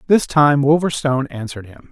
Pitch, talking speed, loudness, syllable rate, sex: 140 Hz, 155 wpm, -16 LUFS, 5.8 syllables/s, male